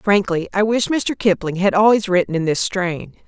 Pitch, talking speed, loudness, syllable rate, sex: 195 Hz, 200 wpm, -18 LUFS, 4.9 syllables/s, female